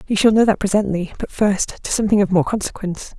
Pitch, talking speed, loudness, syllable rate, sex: 200 Hz, 225 wpm, -18 LUFS, 6.4 syllables/s, female